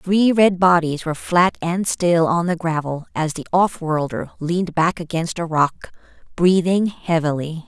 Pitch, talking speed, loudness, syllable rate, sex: 170 Hz, 165 wpm, -19 LUFS, 4.4 syllables/s, female